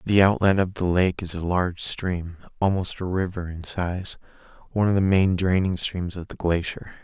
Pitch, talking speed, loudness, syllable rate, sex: 90 Hz, 195 wpm, -24 LUFS, 4.9 syllables/s, male